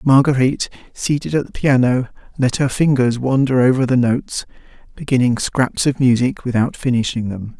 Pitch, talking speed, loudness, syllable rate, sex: 125 Hz, 150 wpm, -17 LUFS, 5.3 syllables/s, male